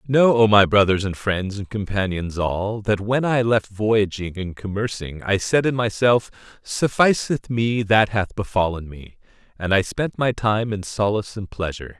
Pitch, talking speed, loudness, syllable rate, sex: 105 Hz, 175 wpm, -21 LUFS, 4.5 syllables/s, male